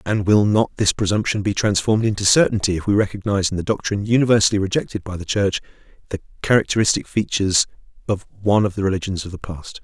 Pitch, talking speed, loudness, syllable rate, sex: 100 Hz, 190 wpm, -19 LUFS, 6.8 syllables/s, male